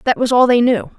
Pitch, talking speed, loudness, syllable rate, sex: 235 Hz, 305 wpm, -14 LUFS, 5.8 syllables/s, female